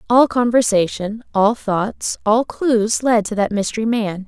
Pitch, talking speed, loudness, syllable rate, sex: 220 Hz, 155 wpm, -18 LUFS, 4.1 syllables/s, female